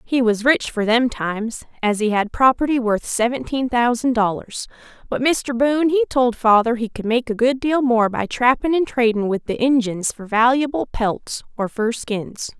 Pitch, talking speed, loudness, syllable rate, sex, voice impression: 240 Hz, 190 wpm, -19 LUFS, 4.7 syllables/s, female, feminine, adult-like, tensed, slightly powerful, slightly bright, clear, fluent, intellectual, friendly, lively, slightly intense, sharp